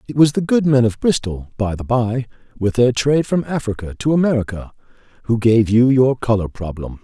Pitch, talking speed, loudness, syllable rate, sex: 120 Hz, 195 wpm, -17 LUFS, 5.4 syllables/s, male